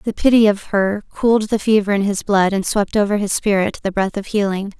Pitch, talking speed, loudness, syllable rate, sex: 205 Hz, 240 wpm, -17 LUFS, 5.6 syllables/s, female